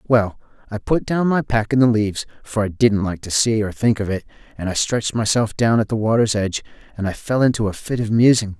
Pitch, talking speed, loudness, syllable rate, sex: 110 Hz, 260 wpm, -19 LUFS, 6.0 syllables/s, male